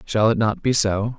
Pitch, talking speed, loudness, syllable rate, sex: 115 Hz, 255 wpm, -20 LUFS, 4.6 syllables/s, male